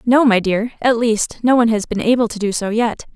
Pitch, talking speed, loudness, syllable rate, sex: 225 Hz, 265 wpm, -16 LUFS, 5.6 syllables/s, female